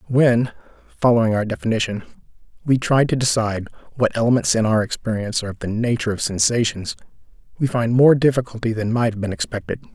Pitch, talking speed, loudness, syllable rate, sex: 115 Hz, 170 wpm, -20 LUFS, 6.5 syllables/s, male